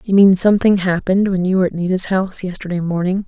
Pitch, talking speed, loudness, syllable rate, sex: 185 Hz, 220 wpm, -16 LUFS, 6.9 syllables/s, female